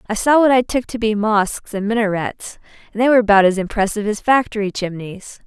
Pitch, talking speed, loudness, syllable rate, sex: 215 Hz, 210 wpm, -17 LUFS, 5.9 syllables/s, female